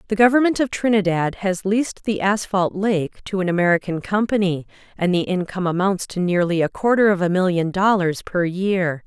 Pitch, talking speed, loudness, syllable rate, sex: 190 Hz, 180 wpm, -20 LUFS, 5.3 syllables/s, female